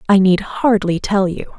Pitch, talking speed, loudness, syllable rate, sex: 195 Hz, 190 wpm, -16 LUFS, 4.6 syllables/s, female